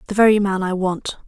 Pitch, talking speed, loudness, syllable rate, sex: 195 Hz, 235 wpm, -18 LUFS, 5.9 syllables/s, female